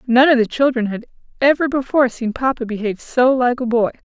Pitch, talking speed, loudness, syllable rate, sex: 250 Hz, 205 wpm, -17 LUFS, 6.1 syllables/s, female